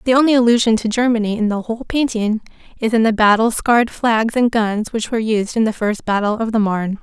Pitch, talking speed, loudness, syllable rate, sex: 225 Hz, 230 wpm, -17 LUFS, 6.0 syllables/s, female